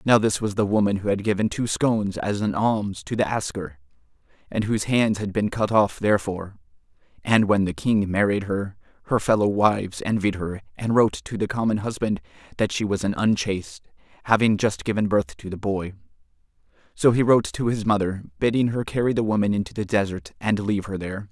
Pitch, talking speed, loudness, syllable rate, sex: 100 Hz, 200 wpm, -23 LUFS, 5.7 syllables/s, male